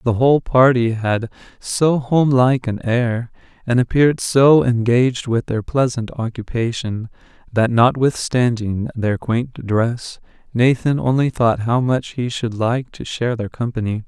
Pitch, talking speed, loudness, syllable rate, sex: 120 Hz, 145 wpm, -18 LUFS, 4.2 syllables/s, male